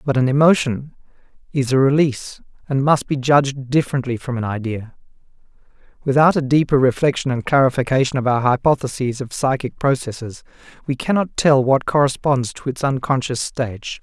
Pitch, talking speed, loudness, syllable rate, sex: 135 Hz, 150 wpm, -18 LUFS, 5.5 syllables/s, male